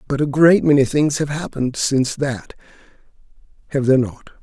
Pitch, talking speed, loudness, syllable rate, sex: 140 Hz, 165 wpm, -18 LUFS, 5.7 syllables/s, male